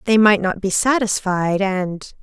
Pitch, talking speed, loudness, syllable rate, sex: 200 Hz, 160 wpm, -18 LUFS, 3.9 syllables/s, female